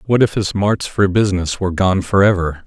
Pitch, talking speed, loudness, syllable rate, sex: 95 Hz, 225 wpm, -16 LUFS, 5.5 syllables/s, male